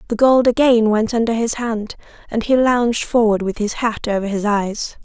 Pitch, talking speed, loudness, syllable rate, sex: 225 Hz, 200 wpm, -17 LUFS, 4.9 syllables/s, female